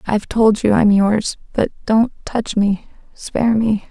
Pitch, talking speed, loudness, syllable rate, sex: 215 Hz, 170 wpm, -17 LUFS, 4.2 syllables/s, female